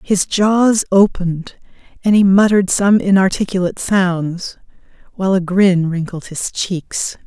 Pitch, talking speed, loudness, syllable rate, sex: 190 Hz, 125 wpm, -15 LUFS, 4.3 syllables/s, female